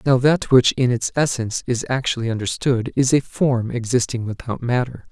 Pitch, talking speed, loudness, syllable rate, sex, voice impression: 125 Hz, 175 wpm, -20 LUFS, 5.2 syllables/s, male, masculine, slightly young, slightly weak, slightly bright, soft, slightly refreshing, slightly sincere, calm, slightly friendly, reassuring, kind, modest